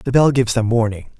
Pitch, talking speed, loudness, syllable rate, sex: 120 Hz, 250 wpm, -17 LUFS, 6.3 syllables/s, male